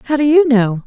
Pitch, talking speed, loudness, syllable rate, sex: 260 Hz, 280 wpm, -12 LUFS, 6.0 syllables/s, female